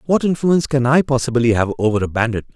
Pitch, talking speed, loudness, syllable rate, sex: 130 Hz, 210 wpm, -17 LUFS, 6.5 syllables/s, male